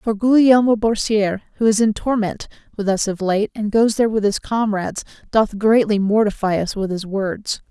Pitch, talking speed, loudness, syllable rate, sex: 210 Hz, 185 wpm, -18 LUFS, 5.0 syllables/s, female